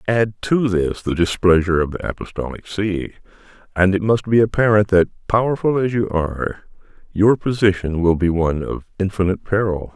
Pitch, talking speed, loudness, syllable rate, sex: 100 Hz, 165 wpm, -19 LUFS, 5.4 syllables/s, male